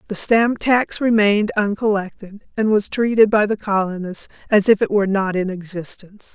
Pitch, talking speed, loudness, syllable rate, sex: 205 Hz, 170 wpm, -18 LUFS, 5.2 syllables/s, female